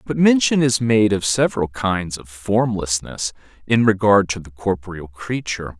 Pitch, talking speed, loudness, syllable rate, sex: 100 Hz, 155 wpm, -19 LUFS, 4.7 syllables/s, male